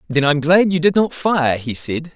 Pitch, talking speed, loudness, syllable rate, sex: 155 Hz, 250 wpm, -17 LUFS, 4.6 syllables/s, male